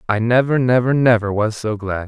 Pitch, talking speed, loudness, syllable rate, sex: 115 Hz, 200 wpm, -17 LUFS, 5.1 syllables/s, male